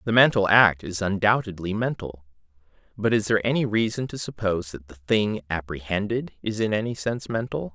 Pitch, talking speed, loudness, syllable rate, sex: 100 Hz, 170 wpm, -24 LUFS, 5.6 syllables/s, male